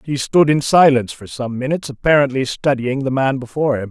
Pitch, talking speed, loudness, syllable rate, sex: 130 Hz, 200 wpm, -17 LUFS, 6.1 syllables/s, male